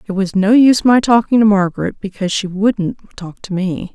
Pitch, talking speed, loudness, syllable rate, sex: 200 Hz, 215 wpm, -14 LUFS, 5.3 syllables/s, female